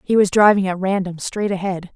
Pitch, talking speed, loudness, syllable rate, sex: 190 Hz, 215 wpm, -18 LUFS, 5.5 syllables/s, female